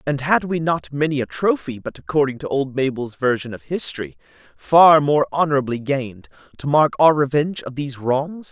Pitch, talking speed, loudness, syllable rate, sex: 140 Hz, 185 wpm, -19 LUFS, 5.4 syllables/s, male